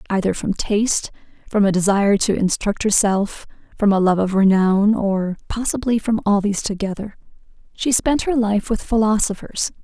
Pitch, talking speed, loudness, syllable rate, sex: 205 Hz, 160 wpm, -19 LUFS, 5.0 syllables/s, female